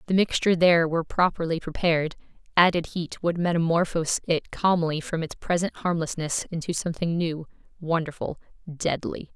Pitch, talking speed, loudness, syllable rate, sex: 165 Hz, 140 wpm, -25 LUFS, 5.7 syllables/s, female